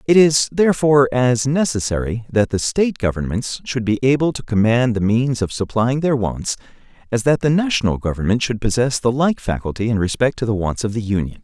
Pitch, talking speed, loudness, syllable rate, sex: 120 Hz, 200 wpm, -18 LUFS, 5.6 syllables/s, male